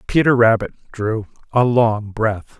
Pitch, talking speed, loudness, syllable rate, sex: 115 Hz, 140 wpm, -18 LUFS, 3.9 syllables/s, male